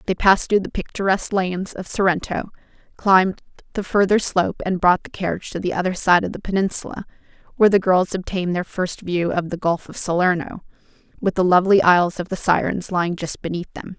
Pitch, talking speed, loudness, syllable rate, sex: 185 Hz, 195 wpm, -20 LUFS, 6.1 syllables/s, female